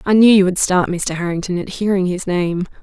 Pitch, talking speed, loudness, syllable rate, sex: 185 Hz, 235 wpm, -16 LUFS, 5.5 syllables/s, female